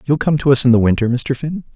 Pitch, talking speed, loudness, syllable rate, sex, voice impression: 135 Hz, 310 wpm, -15 LUFS, 6.5 syllables/s, male, slightly masculine, slightly adult-like, dark, cool, intellectual, calm, slightly wild, slightly kind, slightly modest